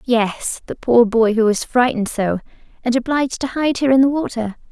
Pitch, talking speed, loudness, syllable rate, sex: 240 Hz, 205 wpm, -18 LUFS, 5.5 syllables/s, female